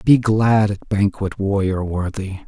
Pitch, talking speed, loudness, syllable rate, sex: 100 Hz, 145 wpm, -19 LUFS, 4.2 syllables/s, male